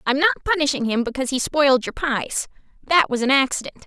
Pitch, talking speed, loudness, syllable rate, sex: 275 Hz, 200 wpm, -20 LUFS, 6.2 syllables/s, female